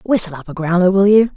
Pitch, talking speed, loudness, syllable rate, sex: 190 Hz, 265 wpm, -14 LUFS, 6.5 syllables/s, female